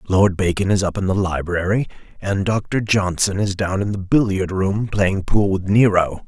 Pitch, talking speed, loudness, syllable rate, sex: 95 Hz, 190 wpm, -19 LUFS, 4.7 syllables/s, male